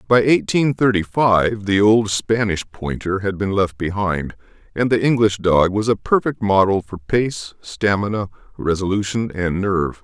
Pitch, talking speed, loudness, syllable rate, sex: 100 Hz, 155 wpm, -18 LUFS, 4.4 syllables/s, male